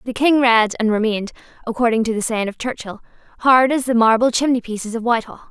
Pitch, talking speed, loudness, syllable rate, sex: 235 Hz, 195 wpm, -17 LUFS, 6.4 syllables/s, female